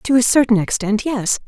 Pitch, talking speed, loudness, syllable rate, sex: 230 Hz, 165 wpm, -16 LUFS, 5.1 syllables/s, female